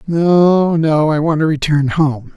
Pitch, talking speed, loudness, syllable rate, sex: 155 Hz, 180 wpm, -14 LUFS, 3.6 syllables/s, male